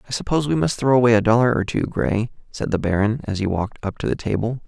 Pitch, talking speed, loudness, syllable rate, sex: 115 Hz, 270 wpm, -21 LUFS, 6.6 syllables/s, male